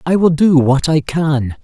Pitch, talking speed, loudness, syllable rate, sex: 150 Hz, 220 wpm, -13 LUFS, 4.0 syllables/s, male